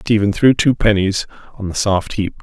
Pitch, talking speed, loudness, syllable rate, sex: 105 Hz, 200 wpm, -16 LUFS, 4.9 syllables/s, male